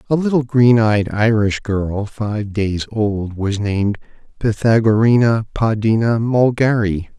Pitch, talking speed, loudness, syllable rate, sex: 110 Hz, 115 wpm, -17 LUFS, 3.9 syllables/s, male